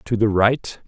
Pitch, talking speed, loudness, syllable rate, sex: 110 Hz, 205 wpm, -19 LUFS, 4.0 syllables/s, male